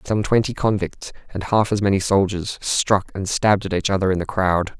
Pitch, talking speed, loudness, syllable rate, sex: 100 Hz, 215 wpm, -20 LUFS, 5.2 syllables/s, male